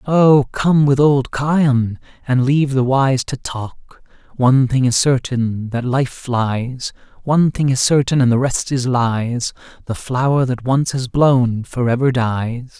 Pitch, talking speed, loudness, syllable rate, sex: 130 Hz, 170 wpm, -17 LUFS, 3.8 syllables/s, male